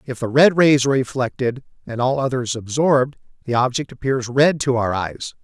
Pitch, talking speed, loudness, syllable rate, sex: 130 Hz, 190 wpm, -19 LUFS, 5.2 syllables/s, male